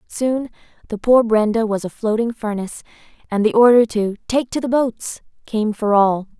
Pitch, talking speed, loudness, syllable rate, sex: 225 Hz, 180 wpm, -18 LUFS, 4.8 syllables/s, female